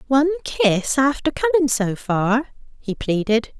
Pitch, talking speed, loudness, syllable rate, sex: 255 Hz, 135 wpm, -20 LUFS, 5.0 syllables/s, female